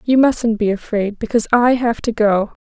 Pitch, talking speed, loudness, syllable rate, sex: 225 Hz, 205 wpm, -16 LUFS, 5.0 syllables/s, female